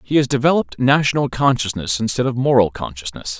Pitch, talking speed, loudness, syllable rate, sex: 120 Hz, 160 wpm, -18 LUFS, 6.1 syllables/s, male